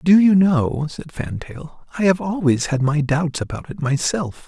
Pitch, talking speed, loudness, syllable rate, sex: 160 Hz, 200 wpm, -19 LUFS, 4.3 syllables/s, male